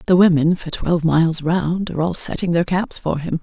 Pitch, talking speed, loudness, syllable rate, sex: 170 Hz, 230 wpm, -18 LUFS, 5.5 syllables/s, female